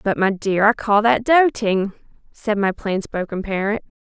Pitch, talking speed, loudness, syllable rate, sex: 210 Hz, 175 wpm, -19 LUFS, 4.4 syllables/s, female